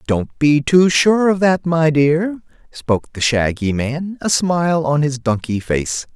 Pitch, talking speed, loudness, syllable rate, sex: 150 Hz, 175 wpm, -16 LUFS, 3.9 syllables/s, male